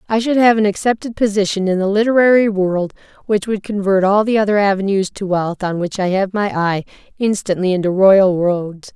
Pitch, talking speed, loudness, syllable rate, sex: 200 Hz, 195 wpm, -16 LUFS, 5.3 syllables/s, female